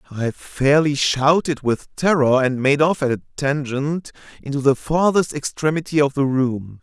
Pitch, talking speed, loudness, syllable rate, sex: 140 Hz, 160 wpm, -19 LUFS, 4.4 syllables/s, male